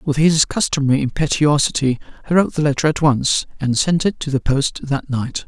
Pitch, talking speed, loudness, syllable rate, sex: 145 Hz, 195 wpm, -18 LUFS, 5.4 syllables/s, male